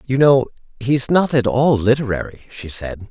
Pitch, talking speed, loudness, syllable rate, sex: 125 Hz, 175 wpm, -17 LUFS, 4.6 syllables/s, male